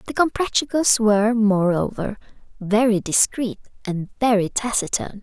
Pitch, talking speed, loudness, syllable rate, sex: 220 Hz, 105 wpm, -20 LUFS, 4.4 syllables/s, female